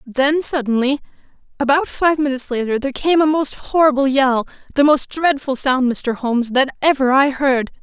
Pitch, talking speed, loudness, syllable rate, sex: 270 Hz, 160 wpm, -17 LUFS, 5.2 syllables/s, female